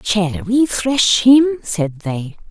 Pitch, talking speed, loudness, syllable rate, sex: 215 Hz, 145 wpm, -15 LUFS, 2.6 syllables/s, female